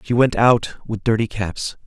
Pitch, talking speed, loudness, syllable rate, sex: 110 Hz, 195 wpm, -19 LUFS, 4.3 syllables/s, male